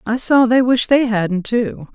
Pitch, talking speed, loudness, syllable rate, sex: 230 Hz, 215 wpm, -15 LUFS, 3.9 syllables/s, female